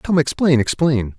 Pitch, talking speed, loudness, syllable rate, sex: 140 Hz, 150 wpm, -17 LUFS, 4.4 syllables/s, male